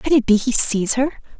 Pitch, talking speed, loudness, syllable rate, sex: 245 Hz, 260 wpm, -16 LUFS, 5.4 syllables/s, female